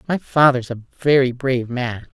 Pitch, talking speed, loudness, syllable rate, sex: 130 Hz, 165 wpm, -18 LUFS, 4.9 syllables/s, female